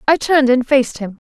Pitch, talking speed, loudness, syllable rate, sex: 260 Hz, 235 wpm, -14 LUFS, 6.5 syllables/s, female